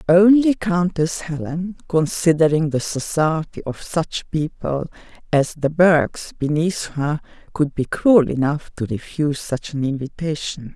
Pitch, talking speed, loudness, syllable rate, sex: 160 Hz, 130 wpm, -20 LUFS, 4.2 syllables/s, female